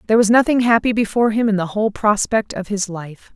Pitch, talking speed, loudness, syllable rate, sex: 210 Hz, 230 wpm, -17 LUFS, 6.3 syllables/s, female